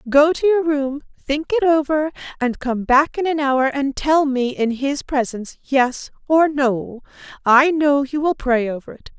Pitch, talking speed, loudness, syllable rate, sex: 280 Hz, 190 wpm, -18 LUFS, 4.2 syllables/s, female